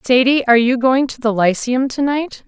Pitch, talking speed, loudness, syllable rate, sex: 255 Hz, 195 wpm, -15 LUFS, 5.2 syllables/s, female